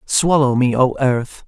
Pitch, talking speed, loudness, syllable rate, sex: 130 Hz, 165 wpm, -16 LUFS, 3.8 syllables/s, male